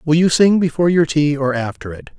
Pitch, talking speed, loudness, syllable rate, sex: 150 Hz, 245 wpm, -15 LUFS, 5.9 syllables/s, male